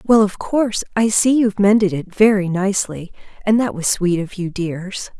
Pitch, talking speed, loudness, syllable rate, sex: 200 Hz, 195 wpm, -17 LUFS, 5.0 syllables/s, female